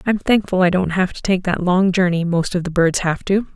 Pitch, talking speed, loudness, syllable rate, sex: 180 Hz, 270 wpm, -18 LUFS, 5.3 syllables/s, female